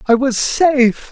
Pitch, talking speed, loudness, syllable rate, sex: 260 Hz, 160 wpm, -14 LUFS, 4.0 syllables/s, male